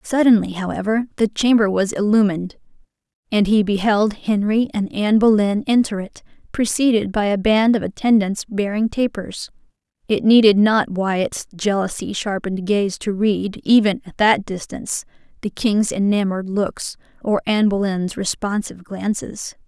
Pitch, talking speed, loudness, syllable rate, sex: 205 Hz, 135 wpm, -19 LUFS, 4.8 syllables/s, female